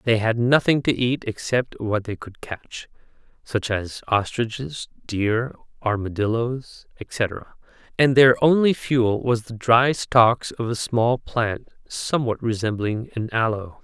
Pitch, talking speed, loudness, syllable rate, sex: 115 Hz, 140 wpm, -22 LUFS, 3.8 syllables/s, male